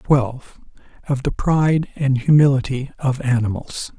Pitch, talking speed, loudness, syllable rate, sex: 135 Hz, 120 wpm, -19 LUFS, 4.6 syllables/s, male